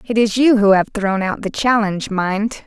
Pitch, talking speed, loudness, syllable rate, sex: 210 Hz, 225 wpm, -16 LUFS, 4.7 syllables/s, female